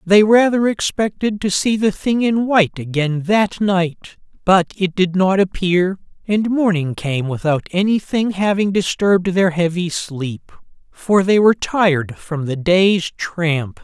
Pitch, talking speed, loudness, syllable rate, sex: 185 Hz, 150 wpm, -17 LUFS, 4.1 syllables/s, male